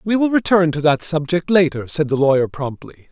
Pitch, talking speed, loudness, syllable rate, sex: 160 Hz, 210 wpm, -17 LUFS, 5.6 syllables/s, male